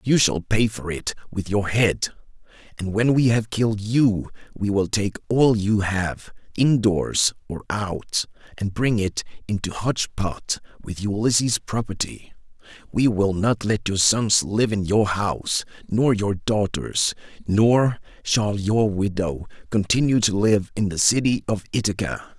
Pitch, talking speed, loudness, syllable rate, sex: 105 Hz, 155 wpm, -22 LUFS, 4.0 syllables/s, male